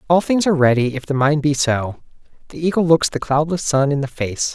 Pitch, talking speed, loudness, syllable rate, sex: 150 Hz, 235 wpm, -18 LUFS, 5.7 syllables/s, male